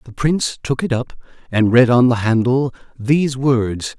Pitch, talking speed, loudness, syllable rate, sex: 125 Hz, 180 wpm, -17 LUFS, 4.6 syllables/s, male